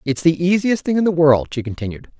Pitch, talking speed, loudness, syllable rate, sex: 155 Hz, 245 wpm, -17 LUFS, 6.0 syllables/s, male